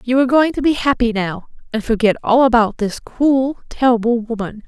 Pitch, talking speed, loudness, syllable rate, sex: 240 Hz, 195 wpm, -16 LUFS, 5.3 syllables/s, female